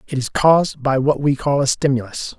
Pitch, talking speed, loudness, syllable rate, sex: 140 Hz, 225 wpm, -18 LUFS, 5.4 syllables/s, male